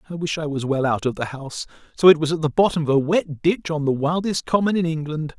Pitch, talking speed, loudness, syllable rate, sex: 155 Hz, 280 wpm, -21 LUFS, 6.2 syllables/s, male